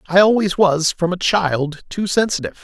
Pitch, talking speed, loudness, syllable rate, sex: 180 Hz, 180 wpm, -17 LUFS, 4.8 syllables/s, male